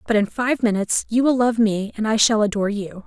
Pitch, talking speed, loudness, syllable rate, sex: 220 Hz, 255 wpm, -20 LUFS, 6.0 syllables/s, female